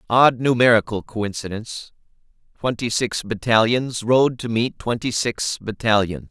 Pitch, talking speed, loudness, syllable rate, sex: 115 Hz, 105 wpm, -20 LUFS, 4.4 syllables/s, male